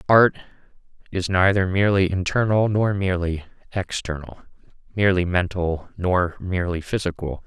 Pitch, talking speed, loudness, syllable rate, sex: 95 Hz, 105 wpm, -22 LUFS, 5.1 syllables/s, male